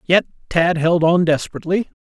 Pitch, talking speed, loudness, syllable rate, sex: 170 Hz, 150 wpm, -18 LUFS, 5.7 syllables/s, male